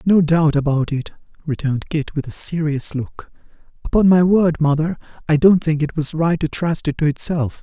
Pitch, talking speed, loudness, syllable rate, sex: 155 Hz, 195 wpm, -18 LUFS, 5.0 syllables/s, male